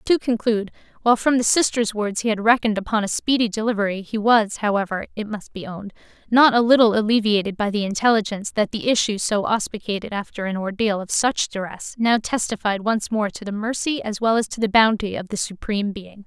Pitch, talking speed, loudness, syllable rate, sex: 215 Hz, 205 wpm, -21 LUFS, 5.9 syllables/s, female